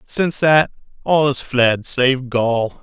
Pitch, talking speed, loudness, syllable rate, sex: 130 Hz, 150 wpm, -17 LUFS, 3.4 syllables/s, male